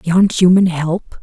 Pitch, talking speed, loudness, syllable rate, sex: 175 Hz, 145 wpm, -13 LUFS, 3.4 syllables/s, female